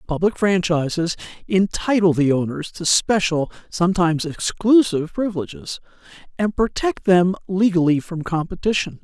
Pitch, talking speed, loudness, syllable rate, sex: 180 Hz, 105 wpm, -20 LUFS, 4.9 syllables/s, male